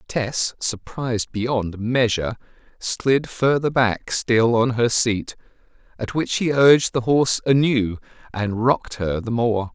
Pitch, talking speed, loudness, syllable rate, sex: 120 Hz, 140 wpm, -20 LUFS, 4.0 syllables/s, male